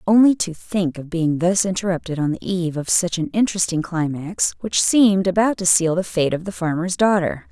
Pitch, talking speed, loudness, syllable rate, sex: 180 Hz, 210 wpm, -19 LUFS, 5.4 syllables/s, female